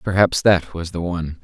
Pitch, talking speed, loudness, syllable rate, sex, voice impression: 90 Hz, 210 wpm, -19 LUFS, 5.3 syllables/s, male, masculine, adult-like, slightly thick, cool, intellectual, slightly refreshing, calm